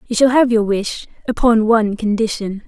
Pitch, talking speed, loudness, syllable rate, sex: 225 Hz, 155 wpm, -16 LUFS, 5.2 syllables/s, female